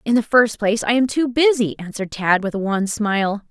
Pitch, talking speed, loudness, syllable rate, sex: 220 Hz, 240 wpm, -19 LUFS, 5.8 syllables/s, female